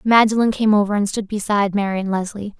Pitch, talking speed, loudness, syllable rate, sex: 205 Hz, 185 wpm, -18 LUFS, 6.0 syllables/s, female